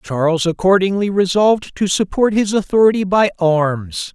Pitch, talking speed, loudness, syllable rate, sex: 190 Hz, 130 wpm, -16 LUFS, 4.8 syllables/s, male